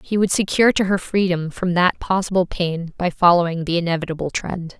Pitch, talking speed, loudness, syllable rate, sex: 180 Hz, 190 wpm, -19 LUFS, 5.6 syllables/s, female